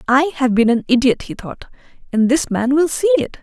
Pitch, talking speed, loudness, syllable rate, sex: 270 Hz, 230 wpm, -16 LUFS, 5.3 syllables/s, female